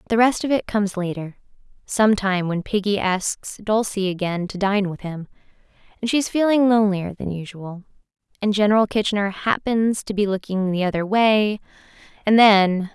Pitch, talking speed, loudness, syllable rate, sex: 200 Hz, 160 wpm, -20 LUFS, 5.3 syllables/s, female